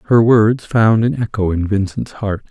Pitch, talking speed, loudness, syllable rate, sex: 105 Hz, 190 wpm, -15 LUFS, 4.4 syllables/s, male